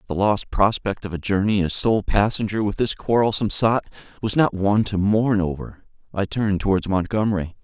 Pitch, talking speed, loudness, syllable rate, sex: 100 Hz, 180 wpm, -21 LUFS, 5.5 syllables/s, male